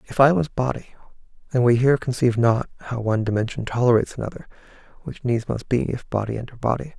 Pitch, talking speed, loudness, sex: 120 Hz, 190 wpm, -22 LUFS, male